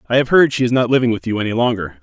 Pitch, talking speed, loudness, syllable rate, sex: 115 Hz, 325 wpm, -16 LUFS, 7.7 syllables/s, male